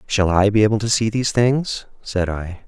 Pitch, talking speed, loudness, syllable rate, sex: 105 Hz, 225 wpm, -19 LUFS, 5.1 syllables/s, male